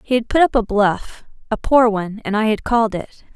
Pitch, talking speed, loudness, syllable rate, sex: 220 Hz, 215 wpm, -17 LUFS, 5.6 syllables/s, female